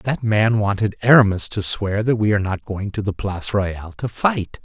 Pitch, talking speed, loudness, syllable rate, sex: 105 Hz, 220 wpm, -19 LUFS, 5.1 syllables/s, male